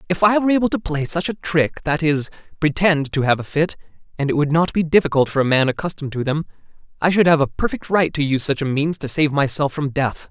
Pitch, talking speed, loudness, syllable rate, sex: 155 Hz, 245 wpm, -19 LUFS, 6.3 syllables/s, male